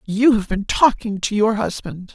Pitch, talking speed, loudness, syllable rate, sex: 210 Hz, 195 wpm, -18 LUFS, 4.5 syllables/s, female